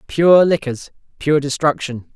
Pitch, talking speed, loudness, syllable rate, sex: 145 Hz, 110 wpm, -16 LUFS, 4.0 syllables/s, male